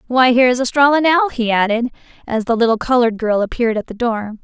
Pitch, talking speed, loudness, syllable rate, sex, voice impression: 240 Hz, 215 wpm, -16 LUFS, 6.6 syllables/s, female, feminine, slightly adult-like, slightly tensed, clear, slightly fluent, cute, friendly, sweet, slightly kind